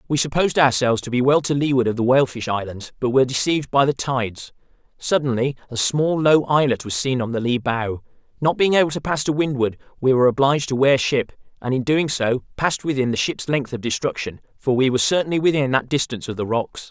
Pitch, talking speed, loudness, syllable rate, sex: 130 Hz, 220 wpm, -20 LUFS, 6.2 syllables/s, male